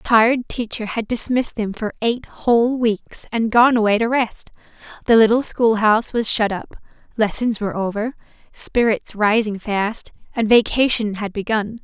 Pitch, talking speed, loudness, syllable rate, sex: 220 Hz, 155 wpm, -19 LUFS, 4.6 syllables/s, female